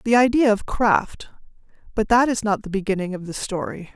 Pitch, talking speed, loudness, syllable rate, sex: 210 Hz, 180 wpm, -21 LUFS, 5.3 syllables/s, female